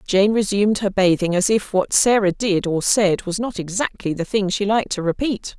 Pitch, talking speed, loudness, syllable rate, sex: 200 Hz, 215 wpm, -19 LUFS, 5.1 syllables/s, female